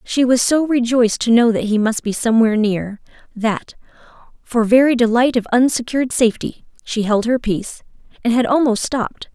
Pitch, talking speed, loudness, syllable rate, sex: 235 Hz, 175 wpm, -16 LUFS, 5.5 syllables/s, female